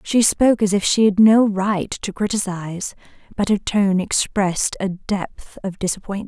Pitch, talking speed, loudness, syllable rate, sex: 200 Hz, 170 wpm, -19 LUFS, 4.7 syllables/s, female